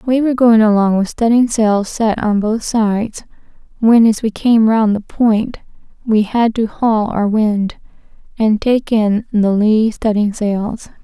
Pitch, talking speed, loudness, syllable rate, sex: 220 Hz, 170 wpm, -14 LUFS, 3.9 syllables/s, female